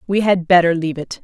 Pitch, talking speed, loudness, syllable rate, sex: 175 Hz, 245 wpm, -16 LUFS, 6.5 syllables/s, female